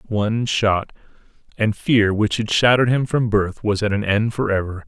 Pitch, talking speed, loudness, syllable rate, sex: 110 Hz, 170 wpm, -19 LUFS, 4.8 syllables/s, male